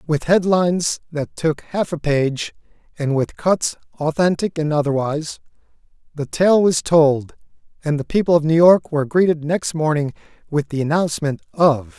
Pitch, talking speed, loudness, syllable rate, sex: 155 Hz, 155 wpm, -18 LUFS, 4.8 syllables/s, male